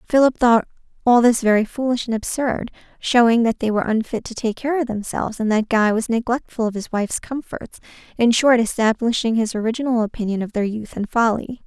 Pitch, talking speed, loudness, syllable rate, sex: 230 Hz, 195 wpm, -19 LUFS, 5.8 syllables/s, female